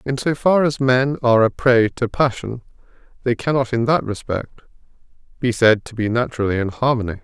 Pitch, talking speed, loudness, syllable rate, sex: 120 Hz, 180 wpm, -19 LUFS, 5.6 syllables/s, male